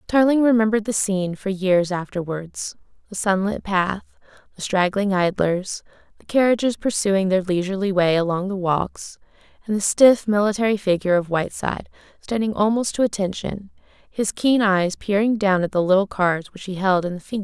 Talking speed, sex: 180 wpm, female